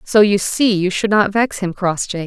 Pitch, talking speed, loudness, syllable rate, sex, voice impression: 200 Hz, 240 wpm, -16 LUFS, 4.5 syllables/s, female, feminine, adult-like, fluent, intellectual, slightly calm